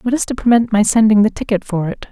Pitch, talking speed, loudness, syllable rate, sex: 220 Hz, 285 wpm, -15 LUFS, 6.3 syllables/s, female